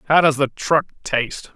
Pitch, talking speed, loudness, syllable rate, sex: 145 Hz, 195 wpm, -19 LUFS, 5.3 syllables/s, male